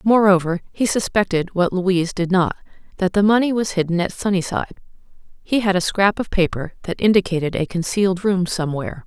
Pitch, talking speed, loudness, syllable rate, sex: 185 Hz, 170 wpm, -19 LUFS, 5.9 syllables/s, female